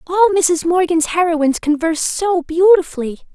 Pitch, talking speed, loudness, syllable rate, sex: 340 Hz, 125 wpm, -15 LUFS, 5.1 syllables/s, female